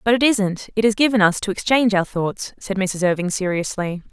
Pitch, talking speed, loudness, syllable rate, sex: 200 Hz, 205 wpm, -19 LUFS, 5.4 syllables/s, female